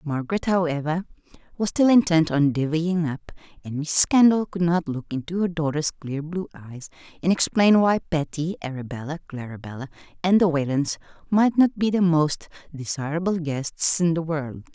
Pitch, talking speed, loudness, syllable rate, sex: 165 Hz, 160 wpm, -22 LUFS, 4.9 syllables/s, female